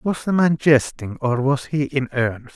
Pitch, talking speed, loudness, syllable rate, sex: 135 Hz, 210 wpm, -20 LUFS, 4.5 syllables/s, male